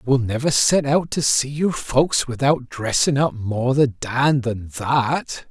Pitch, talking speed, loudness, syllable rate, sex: 130 Hz, 185 wpm, -20 LUFS, 3.8 syllables/s, male